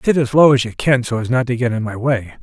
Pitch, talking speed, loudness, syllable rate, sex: 125 Hz, 345 wpm, -16 LUFS, 6.4 syllables/s, male